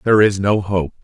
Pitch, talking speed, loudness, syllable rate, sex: 100 Hz, 235 wpm, -16 LUFS, 6.0 syllables/s, male